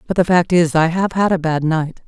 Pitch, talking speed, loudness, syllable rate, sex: 170 Hz, 290 wpm, -16 LUFS, 5.3 syllables/s, female